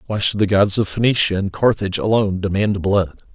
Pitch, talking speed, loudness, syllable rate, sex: 100 Hz, 195 wpm, -18 LUFS, 5.9 syllables/s, male